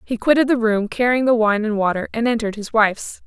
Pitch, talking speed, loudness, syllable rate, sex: 225 Hz, 240 wpm, -18 LUFS, 6.2 syllables/s, female